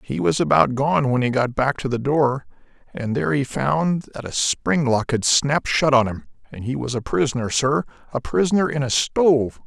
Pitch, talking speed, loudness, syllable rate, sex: 135 Hz, 210 wpm, -20 LUFS, 5.1 syllables/s, male